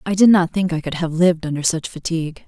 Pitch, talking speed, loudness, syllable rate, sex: 170 Hz, 265 wpm, -18 LUFS, 6.4 syllables/s, female